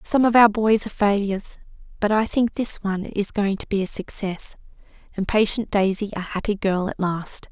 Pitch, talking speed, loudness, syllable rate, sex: 205 Hz, 200 wpm, -22 LUFS, 5.2 syllables/s, female